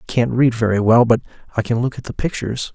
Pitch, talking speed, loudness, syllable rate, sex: 120 Hz, 260 wpm, -18 LUFS, 6.8 syllables/s, male